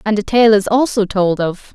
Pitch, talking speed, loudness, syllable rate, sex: 210 Hz, 240 wpm, -14 LUFS, 4.9 syllables/s, female